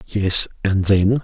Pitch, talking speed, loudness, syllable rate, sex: 100 Hz, 145 wpm, -17 LUFS, 3.3 syllables/s, male